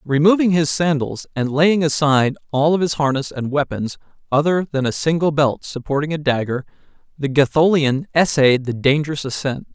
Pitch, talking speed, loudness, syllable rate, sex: 145 Hz, 160 wpm, -18 LUFS, 5.2 syllables/s, male